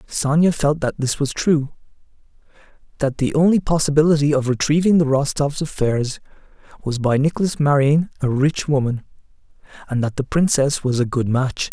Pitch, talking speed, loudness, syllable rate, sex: 140 Hz, 155 wpm, -19 LUFS, 5.2 syllables/s, male